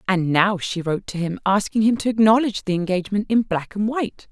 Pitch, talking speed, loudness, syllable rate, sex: 200 Hz, 220 wpm, -20 LUFS, 6.2 syllables/s, female